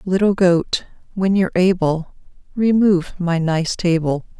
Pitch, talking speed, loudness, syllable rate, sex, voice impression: 180 Hz, 125 wpm, -18 LUFS, 4.4 syllables/s, female, very feminine, very adult-like, middle-aged, slightly thin, relaxed, weak, slightly dark, slightly muffled, fluent, slightly cool, very intellectual, sincere, very calm, very friendly, very reassuring, slightly unique, very elegant, slightly sweet, very kind, modest